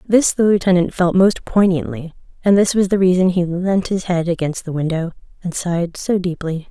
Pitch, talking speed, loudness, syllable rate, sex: 180 Hz, 195 wpm, -17 LUFS, 5.2 syllables/s, female